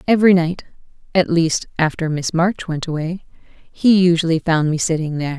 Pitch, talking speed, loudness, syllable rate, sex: 165 Hz, 145 wpm, -18 LUFS, 5.1 syllables/s, female